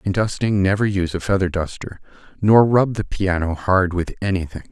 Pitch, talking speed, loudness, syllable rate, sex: 95 Hz, 180 wpm, -19 LUFS, 5.4 syllables/s, male